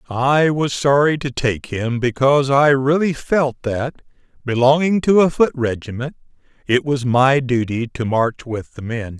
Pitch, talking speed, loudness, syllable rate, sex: 130 Hz, 165 wpm, -18 LUFS, 4.3 syllables/s, male